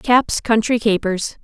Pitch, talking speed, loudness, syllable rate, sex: 220 Hz, 125 wpm, -17 LUFS, 3.7 syllables/s, female